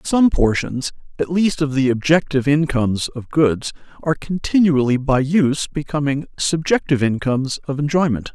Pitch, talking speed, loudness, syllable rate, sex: 145 Hz, 135 wpm, -19 LUFS, 5.3 syllables/s, male